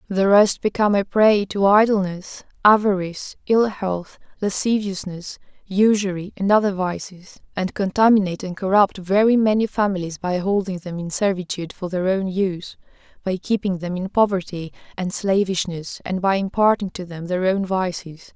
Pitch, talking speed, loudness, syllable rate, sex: 190 Hz, 150 wpm, -20 LUFS, 5.1 syllables/s, female